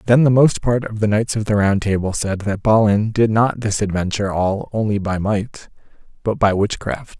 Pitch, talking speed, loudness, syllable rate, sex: 105 Hz, 210 wpm, -18 LUFS, 5.0 syllables/s, male